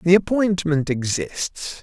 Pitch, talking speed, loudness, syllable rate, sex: 165 Hz, 100 wpm, -21 LUFS, 3.5 syllables/s, male